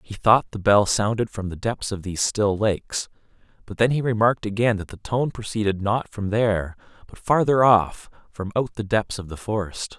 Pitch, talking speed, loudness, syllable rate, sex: 105 Hz, 205 wpm, -22 LUFS, 5.2 syllables/s, male